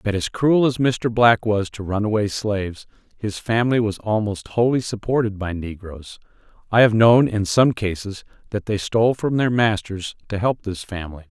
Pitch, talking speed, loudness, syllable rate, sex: 105 Hz, 180 wpm, -20 LUFS, 4.9 syllables/s, male